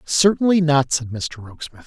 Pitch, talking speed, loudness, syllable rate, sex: 145 Hz, 160 wpm, -18 LUFS, 5.1 syllables/s, male